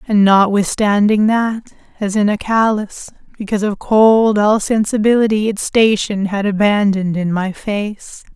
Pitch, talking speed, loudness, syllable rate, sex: 210 Hz, 135 wpm, -15 LUFS, 4.4 syllables/s, female